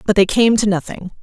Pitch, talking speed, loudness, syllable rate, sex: 205 Hz, 245 wpm, -15 LUFS, 5.9 syllables/s, female